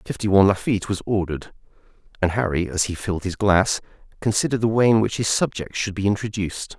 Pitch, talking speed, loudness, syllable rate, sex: 100 Hz, 205 wpm, -21 LUFS, 6.8 syllables/s, male